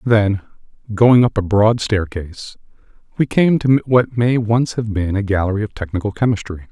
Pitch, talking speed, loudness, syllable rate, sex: 105 Hz, 170 wpm, -17 LUFS, 5.0 syllables/s, male